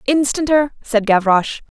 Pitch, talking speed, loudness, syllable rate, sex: 250 Hz, 100 wpm, -16 LUFS, 4.7 syllables/s, female